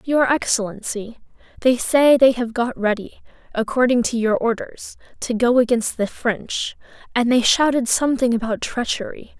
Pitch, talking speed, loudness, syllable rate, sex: 240 Hz, 145 wpm, -19 LUFS, 4.7 syllables/s, female